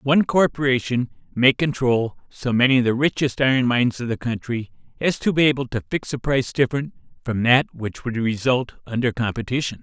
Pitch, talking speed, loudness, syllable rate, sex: 125 Hz, 185 wpm, -21 LUFS, 5.6 syllables/s, male